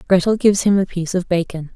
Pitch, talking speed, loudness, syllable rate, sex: 185 Hz, 240 wpm, -17 LUFS, 7.1 syllables/s, female